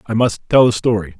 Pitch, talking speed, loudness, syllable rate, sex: 110 Hz, 250 wpm, -15 LUFS, 6.2 syllables/s, male